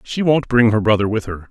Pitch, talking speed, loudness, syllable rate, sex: 115 Hz, 280 wpm, -16 LUFS, 5.7 syllables/s, male